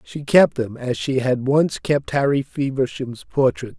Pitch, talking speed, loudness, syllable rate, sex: 135 Hz, 175 wpm, -20 LUFS, 4.1 syllables/s, male